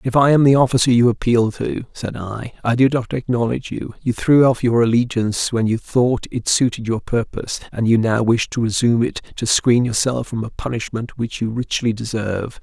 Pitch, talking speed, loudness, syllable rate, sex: 120 Hz, 210 wpm, -18 LUFS, 5.3 syllables/s, male